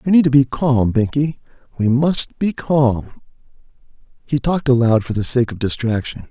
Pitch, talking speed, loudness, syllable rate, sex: 130 Hz, 170 wpm, -17 LUFS, 4.8 syllables/s, male